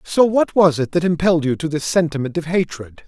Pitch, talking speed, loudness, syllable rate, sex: 165 Hz, 235 wpm, -18 LUFS, 5.7 syllables/s, male